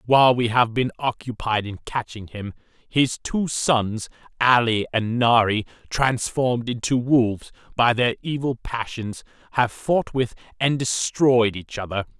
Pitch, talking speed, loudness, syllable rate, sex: 120 Hz, 140 wpm, -22 LUFS, 4.2 syllables/s, male